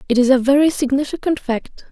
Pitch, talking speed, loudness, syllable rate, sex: 265 Hz, 190 wpm, -17 LUFS, 5.9 syllables/s, female